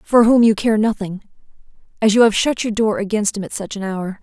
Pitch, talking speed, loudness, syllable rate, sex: 210 Hz, 240 wpm, -17 LUFS, 5.6 syllables/s, female